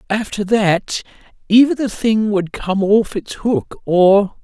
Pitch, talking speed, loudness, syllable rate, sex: 210 Hz, 150 wpm, -16 LUFS, 3.6 syllables/s, male